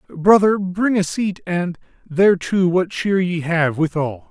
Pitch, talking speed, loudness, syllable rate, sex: 175 Hz, 155 wpm, -18 LUFS, 4.1 syllables/s, male